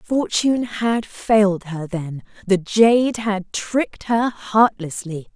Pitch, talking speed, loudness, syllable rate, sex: 205 Hz, 125 wpm, -19 LUFS, 3.4 syllables/s, female